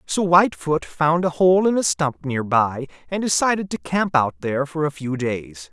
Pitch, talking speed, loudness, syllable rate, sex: 150 Hz, 210 wpm, -20 LUFS, 4.7 syllables/s, male